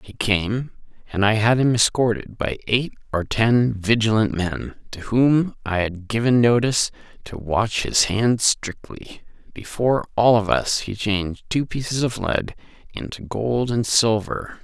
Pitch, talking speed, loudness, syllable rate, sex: 110 Hz, 155 wpm, -20 LUFS, 4.2 syllables/s, male